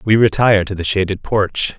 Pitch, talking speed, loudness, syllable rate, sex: 100 Hz, 200 wpm, -16 LUFS, 5.4 syllables/s, male